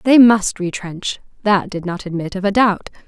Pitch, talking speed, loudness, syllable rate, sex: 195 Hz, 195 wpm, -17 LUFS, 4.9 syllables/s, female